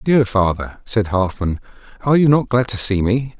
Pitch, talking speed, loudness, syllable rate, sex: 110 Hz, 195 wpm, -17 LUFS, 4.8 syllables/s, male